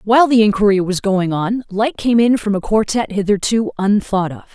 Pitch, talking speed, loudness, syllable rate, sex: 210 Hz, 200 wpm, -16 LUFS, 5.2 syllables/s, female